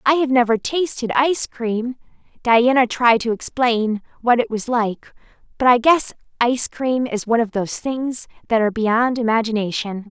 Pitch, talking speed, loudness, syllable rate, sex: 235 Hz, 165 wpm, -19 LUFS, 4.9 syllables/s, female